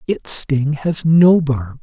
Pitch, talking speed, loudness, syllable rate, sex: 150 Hz, 165 wpm, -15 LUFS, 3.0 syllables/s, male